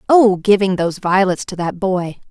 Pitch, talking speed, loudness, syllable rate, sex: 190 Hz, 180 wpm, -16 LUFS, 4.9 syllables/s, female